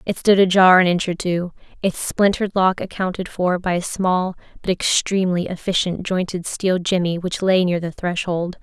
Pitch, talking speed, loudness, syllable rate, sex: 180 Hz, 180 wpm, -19 LUFS, 4.9 syllables/s, female